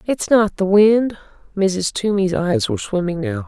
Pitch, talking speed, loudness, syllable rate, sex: 200 Hz, 175 wpm, -18 LUFS, 4.4 syllables/s, female